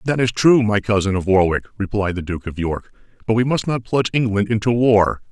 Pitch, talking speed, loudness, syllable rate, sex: 105 Hz, 225 wpm, -18 LUFS, 5.7 syllables/s, male